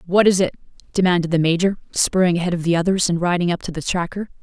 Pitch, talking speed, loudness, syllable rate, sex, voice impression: 175 Hz, 230 wpm, -19 LUFS, 6.8 syllables/s, female, feminine, adult-like, fluent, slightly intellectual, slightly strict